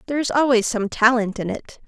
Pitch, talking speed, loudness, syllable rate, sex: 240 Hz, 225 wpm, -19 LUFS, 6.1 syllables/s, female